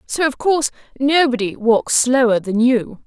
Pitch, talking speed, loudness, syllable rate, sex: 250 Hz, 155 wpm, -17 LUFS, 4.5 syllables/s, female